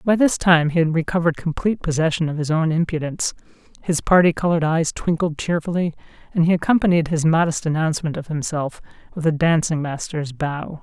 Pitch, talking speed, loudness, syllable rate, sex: 160 Hz, 170 wpm, -20 LUFS, 6.0 syllables/s, female